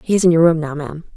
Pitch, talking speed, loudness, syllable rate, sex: 165 Hz, 360 wpm, -15 LUFS, 8.2 syllables/s, female